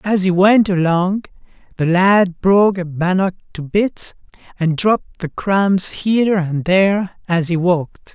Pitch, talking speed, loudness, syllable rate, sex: 185 Hz, 155 wpm, -16 LUFS, 4.2 syllables/s, male